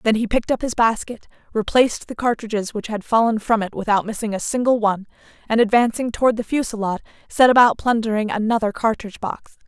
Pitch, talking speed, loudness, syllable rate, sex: 225 Hz, 185 wpm, -20 LUFS, 6.3 syllables/s, female